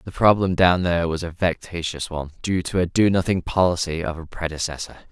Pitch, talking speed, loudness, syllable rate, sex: 85 Hz, 200 wpm, -22 LUFS, 5.9 syllables/s, male